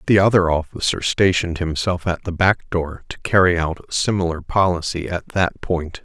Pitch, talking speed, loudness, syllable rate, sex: 90 Hz, 180 wpm, -19 LUFS, 5.0 syllables/s, male